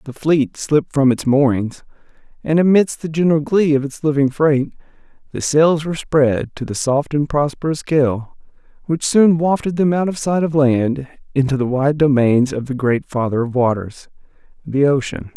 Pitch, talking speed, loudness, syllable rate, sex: 140 Hz, 180 wpm, -17 LUFS, 4.8 syllables/s, male